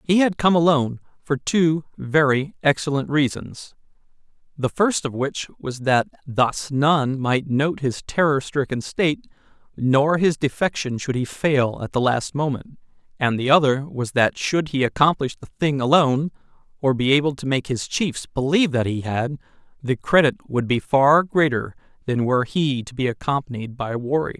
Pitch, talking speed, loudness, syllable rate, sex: 140 Hz, 170 wpm, -21 LUFS, 4.6 syllables/s, male